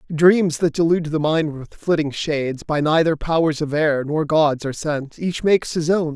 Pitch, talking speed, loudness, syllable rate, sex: 155 Hz, 205 wpm, -20 LUFS, 4.9 syllables/s, male